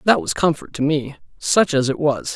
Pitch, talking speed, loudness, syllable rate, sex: 155 Hz, 230 wpm, -19 LUFS, 5.0 syllables/s, male